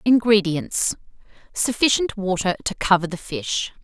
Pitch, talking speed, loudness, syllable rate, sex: 200 Hz, 95 wpm, -21 LUFS, 4.5 syllables/s, female